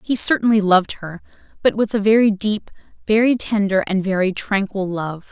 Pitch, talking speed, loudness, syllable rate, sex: 205 Hz, 170 wpm, -18 LUFS, 5.2 syllables/s, female